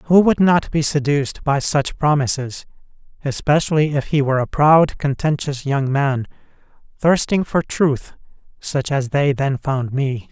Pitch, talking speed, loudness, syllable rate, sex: 145 Hz, 150 wpm, -18 LUFS, 4.3 syllables/s, male